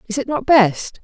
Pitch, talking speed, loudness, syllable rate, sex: 235 Hz, 230 wpm, -16 LUFS, 4.7 syllables/s, female